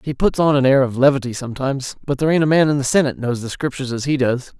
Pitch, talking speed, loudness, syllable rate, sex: 135 Hz, 285 wpm, -18 LUFS, 7.4 syllables/s, male